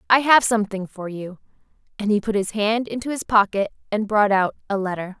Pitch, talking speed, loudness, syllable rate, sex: 210 Hz, 210 wpm, -21 LUFS, 5.7 syllables/s, female